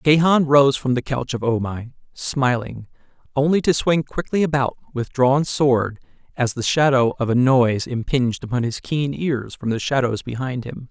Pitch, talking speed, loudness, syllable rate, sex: 130 Hz, 180 wpm, -20 LUFS, 4.6 syllables/s, male